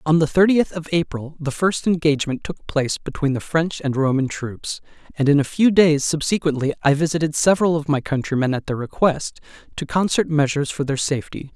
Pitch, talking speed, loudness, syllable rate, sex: 150 Hz, 190 wpm, -20 LUFS, 5.7 syllables/s, male